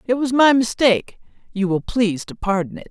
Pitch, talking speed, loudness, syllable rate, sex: 220 Hz, 205 wpm, -19 LUFS, 5.7 syllables/s, female